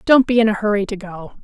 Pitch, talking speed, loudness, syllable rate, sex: 210 Hz, 295 wpm, -17 LUFS, 6.4 syllables/s, female